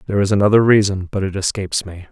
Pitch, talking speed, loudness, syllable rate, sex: 95 Hz, 225 wpm, -17 LUFS, 7.3 syllables/s, male